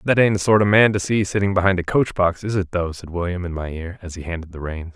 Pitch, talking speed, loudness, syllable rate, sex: 90 Hz, 315 wpm, -20 LUFS, 6.3 syllables/s, male